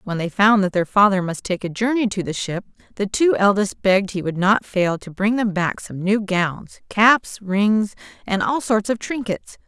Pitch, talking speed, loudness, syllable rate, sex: 200 Hz, 215 wpm, -20 LUFS, 4.6 syllables/s, female